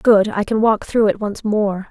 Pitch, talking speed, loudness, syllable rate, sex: 210 Hz, 250 wpm, -17 LUFS, 4.3 syllables/s, female